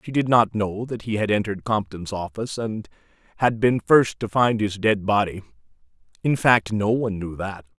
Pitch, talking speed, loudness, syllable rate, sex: 105 Hz, 190 wpm, -22 LUFS, 5.2 syllables/s, male